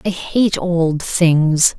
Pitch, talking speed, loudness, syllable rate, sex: 170 Hz, 135 wpm, -16 LUFS, 2.4 syllables/s, female